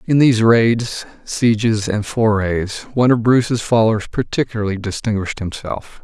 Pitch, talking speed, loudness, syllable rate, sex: 110 Hz, 130 wpm, -17 LUFS, 5.0 syllables/s, male